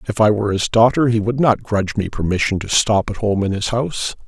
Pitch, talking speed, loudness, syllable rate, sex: 110 Hz, 250 wpm, -18 LUFS, 6.0 syllables/s, male